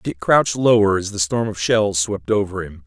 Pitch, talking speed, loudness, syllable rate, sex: 100 Hz, 230 wpm, -18 LUFS, 5.0 syllables/s, male